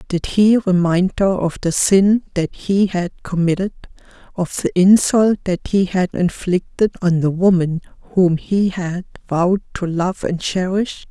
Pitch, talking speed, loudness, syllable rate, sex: 185 Hz, 150 wpm, -17 LUFS, 4.2 syllables/s, female